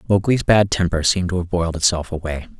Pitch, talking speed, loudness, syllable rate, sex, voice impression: 90 Hz, 210 wpm, -19 LUFS, 6.5 syllables/s, male, very masculine, very adult-like, middle-aged, very thick, slightly relaxed, slightly weak, slightly dark, slightly hard, slightly muffled, slightly fluent, cool, intellectual, slightly refreshing, very sincere, very calm, mature, very friendly, very reassuring, unique, slightly elegant, wild, sweet, very kind, modest